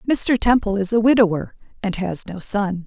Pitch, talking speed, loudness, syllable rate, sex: 205 Hz, 190 wpm, -19 LUFS, 5.1 syllables/s, female